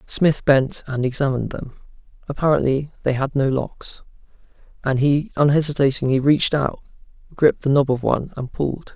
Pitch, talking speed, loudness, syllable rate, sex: 140 Hz, 145 wpm, -20 LUFS, 5.5 syllables/s, male